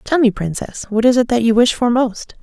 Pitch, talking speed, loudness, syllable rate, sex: 235 Hz, 270 wpm, -16 LUFS, 5.3 syllables/s, female